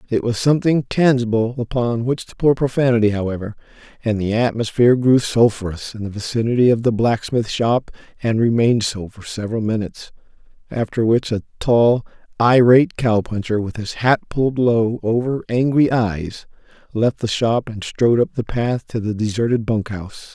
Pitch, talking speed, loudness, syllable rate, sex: 115 Hz, 165 wpm, -18 LUFS, 5.2 syllables/s, male